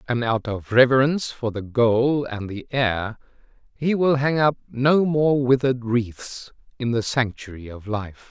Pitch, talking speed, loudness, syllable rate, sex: 125 Hz, 165 wpm, -21 LUFS, 4.2 syllables/s, male